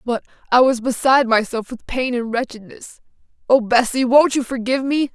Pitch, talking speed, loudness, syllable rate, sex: 245 Hz, 175 wpm, -18 LUFS, 5.4 syllables/s, female